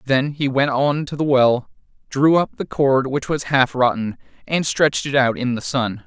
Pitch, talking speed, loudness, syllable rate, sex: 135 Hz, 220 wpm, -19 LUFS, 4.6 syllables/s, male